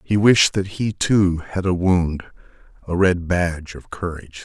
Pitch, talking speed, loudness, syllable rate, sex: 90 Hz, 175 wpm, -19 LUFS, 4.5 syllables/s, male